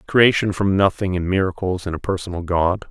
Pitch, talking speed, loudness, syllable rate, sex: 95 Hz, 185 wpm, -20 LUFS, 5.5 syllables/s, male